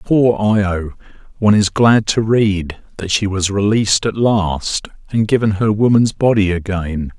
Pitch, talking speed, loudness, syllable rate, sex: 100 Hz, 165 wpm, -15 LUFS, 4.3 syllables/s, male